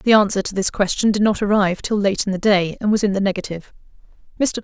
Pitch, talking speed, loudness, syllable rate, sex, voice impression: 200 Hz, 235 wpm, -18 LUFS, 6.7 syllables/s, female, very feminine, adult-like, slightly middle-aged, very thin, slightly tensed, slightly powerful, bright, very hard, very clear, very fluent, cool, very intellectual, refreshing, very sincere, very calm, unique, elegant, slightly sweet, slightly lively, very strict, very sharp